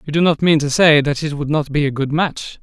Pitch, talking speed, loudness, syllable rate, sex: 150 Hz, 320 wpm, -16 LUFS, 5.7 syllables/s, male